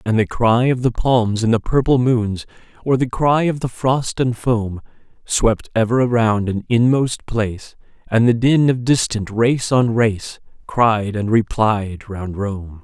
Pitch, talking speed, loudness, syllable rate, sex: 115 Hz, 175 wpm, -18 LUFS, 3.9 syllables/s, male